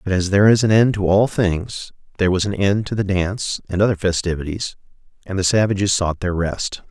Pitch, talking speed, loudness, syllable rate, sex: 95 Hz, 215 wpm, -19 LUFS, 5.8 syllables/s, male